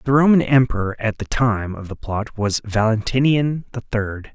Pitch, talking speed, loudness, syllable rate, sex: 115 Hz, 180 wpm, -19 LUFS, 4.6 syllables/s, male